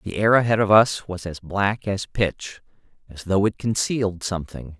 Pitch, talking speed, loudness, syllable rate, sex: 100 Hz, 190 wpm, -21 LUFS, 4.7 syllables/s, male